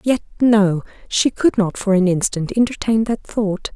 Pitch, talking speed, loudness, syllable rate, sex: 210 Hz, 175 wpm, -18 LUFS, 4.4 syllables/s, female